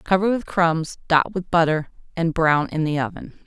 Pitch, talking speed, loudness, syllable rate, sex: 165 Hz, 190 wpm, -21 LUFS, 4.7 syllables/s, female